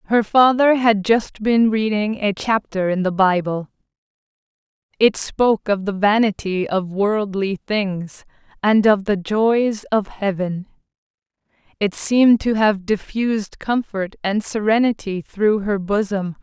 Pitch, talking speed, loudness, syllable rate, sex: 205 Hz, 130 wpm, -19 LUFS, 4.0 syllables/s, female